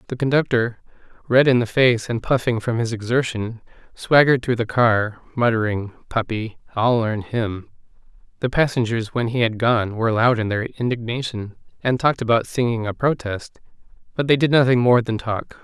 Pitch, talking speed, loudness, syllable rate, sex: 120 Hz, 170 wpm, -20 LUFS, 5.2 syllables/s, male